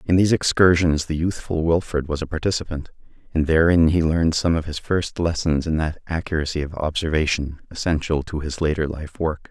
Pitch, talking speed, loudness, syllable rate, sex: 80 Hz, 185 wpm, -21 LUFS, 5.6 syllables/s, male